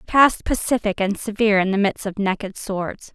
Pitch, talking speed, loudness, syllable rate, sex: 205 Hz, 210 wpm, -21 LUFS, 5.7 syllables/s, female